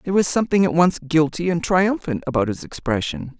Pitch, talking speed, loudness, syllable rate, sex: 165 Hz, 195 wpm, -20 LUFS, 5.9 syllables/s, female